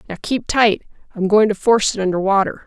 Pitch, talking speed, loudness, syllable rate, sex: 205 Hz, 225 wpm, -17 LUFS, 6.1 syllables/s, female